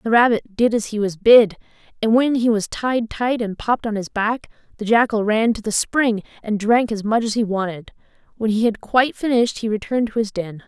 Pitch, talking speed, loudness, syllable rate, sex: 220 Hz, 230 wpm, -19 LUFS, 5.5 syllables/s, female